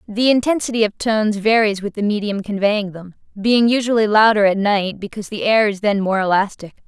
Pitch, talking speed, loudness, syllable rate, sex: 210 Hz, 190 wpm, -17 LUFS, 5.6 syllables/s, female